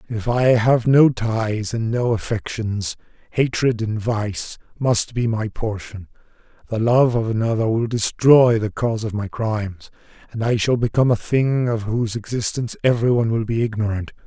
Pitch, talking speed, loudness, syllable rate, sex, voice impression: 115 Hz, 165 wpm, -20 LUFS, 4.8 syllables/s, male, very masculine, cool, calm, mature, elegant, slightly wild